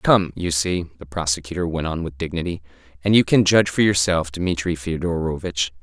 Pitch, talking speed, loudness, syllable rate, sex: 85 Hz, 175 wpm, -21 LUFS, 5.5 syllables/s, male